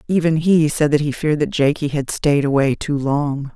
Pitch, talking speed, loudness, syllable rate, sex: 150 Hz, 220 wpm, -18 LUFS, 5.0 syllables/s, female